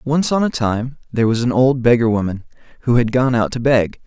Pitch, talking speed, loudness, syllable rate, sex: 120 Hz, 235 wpm, -17 LUFS, 5.6 syllables/s, male